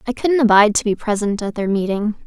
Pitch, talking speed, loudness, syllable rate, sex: 220 Hz, 240 wpm, -17 LUFS, 6.4 syllables/s, female